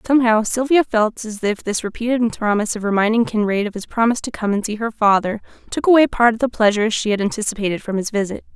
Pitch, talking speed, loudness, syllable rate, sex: 220 Hz, 225 wpm, -18 LUFS, 6.6 syllables/s, female